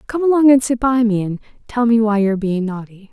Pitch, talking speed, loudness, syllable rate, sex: 225 Hz, 250 wpm, -16 LUFS, 6.0 syllables/s, female